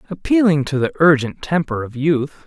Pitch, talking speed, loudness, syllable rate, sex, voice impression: 150 Hz, 170 wpm, -17 LUFS, 5.1 syllables/s, male, masculine, adult-like, refreshing, friendly, slightly unique